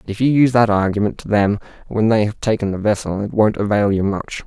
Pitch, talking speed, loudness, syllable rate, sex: 105 Hz, 255 wpm, -18 LUFS, 6.1 syllables/s, male